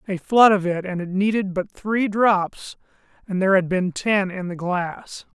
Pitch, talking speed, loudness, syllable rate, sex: 190 Hz, 190 wpm, -21 LUFS, 4.3 syllables/s, male